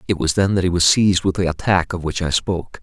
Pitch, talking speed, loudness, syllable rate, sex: 90 Hz, 295 wpm, -18 LUFS, 6.4 syllables/s, male